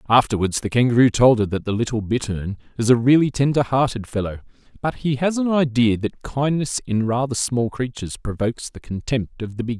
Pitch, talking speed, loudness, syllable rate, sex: 120 Hz, 200 wpm, -21 LUFS, 5.7 syllables/s, male